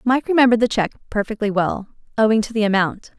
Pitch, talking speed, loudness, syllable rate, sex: 220 Hz, 190 wpm, -19 LUFS, 7.0 syllables/s, female